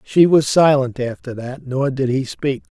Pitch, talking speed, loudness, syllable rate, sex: 135 Hz, 195 wpm, -18 LUFS, 4.3 syllables/s, male